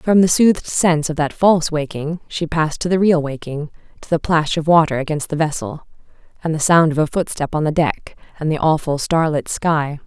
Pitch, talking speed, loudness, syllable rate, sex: 155 Hz, 210 wpm, -18 LUFS, 5.4 syllables/s, female